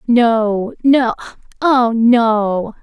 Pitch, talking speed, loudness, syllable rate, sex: 230 Hz, 65 wpm, -14 LUFS, 1.9 syllables/s, female